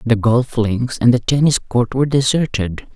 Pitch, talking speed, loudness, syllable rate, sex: 120 Hz, 185 wpm, -16 LUFS, 4.6 syllables/s, female